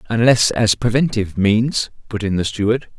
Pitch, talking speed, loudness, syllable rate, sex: 110 Hz, 160 wpm, -17 LUFS, 5.1 syllables/s, male